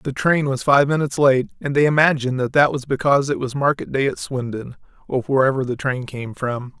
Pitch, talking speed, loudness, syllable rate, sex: 135 Hz, 220 wpm, -19 LUFS, 5.7 syllables/s, male